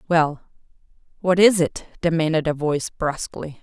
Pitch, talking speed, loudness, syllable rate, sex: 165 Hz, 130 wpm, -21 LUFS, 5.3 syllables/s, female